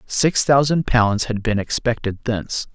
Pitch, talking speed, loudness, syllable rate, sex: 120 Hz, 155 wpm, -19 LUFS, 4.3 syllables/s, male